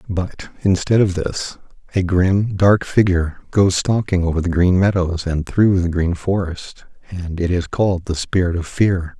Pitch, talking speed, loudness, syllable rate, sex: 90 Hz, 175 wpm, -18 LUFS, 4.5 syllables/s, male